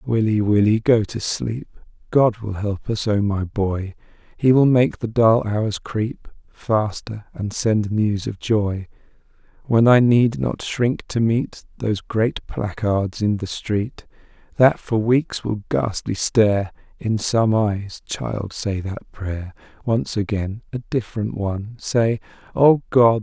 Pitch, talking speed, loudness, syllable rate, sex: 110 Hz, 145 wpm, -20 LUFS, 3.6 syllables/s, male